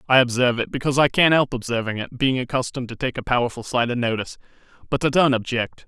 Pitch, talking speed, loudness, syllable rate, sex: 125 Hz, 225 wpm, -21 LUFS, 7.0 syllables/s, male